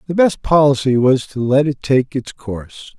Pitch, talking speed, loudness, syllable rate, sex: 135 Hz, 200 wpm, -16 LUFS, 4.6 syllables/s, male